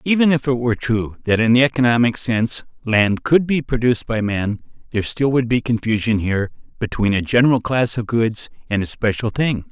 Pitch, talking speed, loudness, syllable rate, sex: 115 Hz, 200 wpm, -19 LUFS, 5.7 syllables/s, male